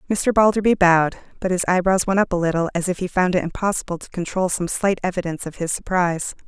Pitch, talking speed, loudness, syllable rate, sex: 180 Hz, 220 wpm, -20 LUFS, 6.5 syllables/s, female